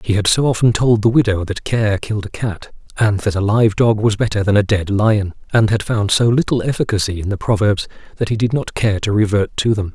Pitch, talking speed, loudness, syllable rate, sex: 105 Hz, 245 wpm, -16 LUFS, 5.6 syllables/s, male